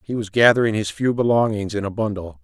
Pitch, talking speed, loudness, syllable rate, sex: 110 Hz, 220 wpm, -20 LUFS, 6.1 syllables/s, male